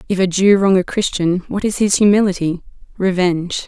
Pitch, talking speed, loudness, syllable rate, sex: 190 Hz, 165 wpm, -16 LUFS, 5.5 syllables/s, female